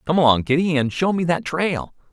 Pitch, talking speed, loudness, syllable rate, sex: 155 Hz, 225 wpm, -20 LUFS, 5.5 syllables/s, male